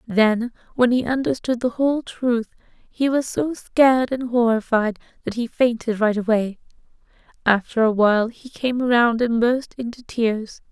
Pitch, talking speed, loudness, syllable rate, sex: 235 Hz, 155 wpm, -21 LUFS, 4.4 syllables/s, female